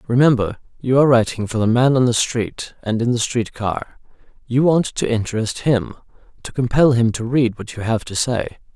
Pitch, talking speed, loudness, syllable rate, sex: 120 Hz, 205 wpm, -18 LUFS, 5.3 syllables/s, male